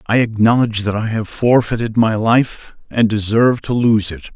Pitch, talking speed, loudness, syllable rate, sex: 110 Hz, 180 wpm, -16 LUFS, 4.9 syllables/s, male